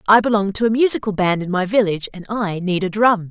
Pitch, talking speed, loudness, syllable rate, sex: 200 Hz, 255 wpm, -18 LUFS, 6.2 syllables/s, female